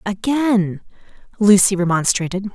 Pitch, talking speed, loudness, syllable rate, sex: 200 Hz, 70 wpm, -17 LUFS, 4.2 syllables/s, female